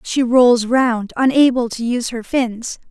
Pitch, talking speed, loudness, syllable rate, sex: 240 Hz, 165 wpm, -16 LUFS, 4.1 syllables/s, female